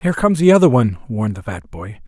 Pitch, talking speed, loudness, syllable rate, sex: 130 Hz, 260 wpm, -15 LUFS, 7.5 syllables/s, male